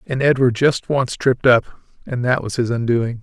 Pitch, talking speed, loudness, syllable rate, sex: 125 Hz, 205 wpm, -18 LUFS, 4.9 syllables/s, male